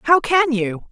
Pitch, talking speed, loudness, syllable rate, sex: 270 Hz, 195 wpm, -17 LUFS, 3.5 syllables/s, female